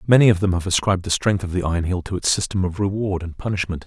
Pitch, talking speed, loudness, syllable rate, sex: 95 Hz, 280 wpm, -21 LUFS, 7.0 syllables/s, male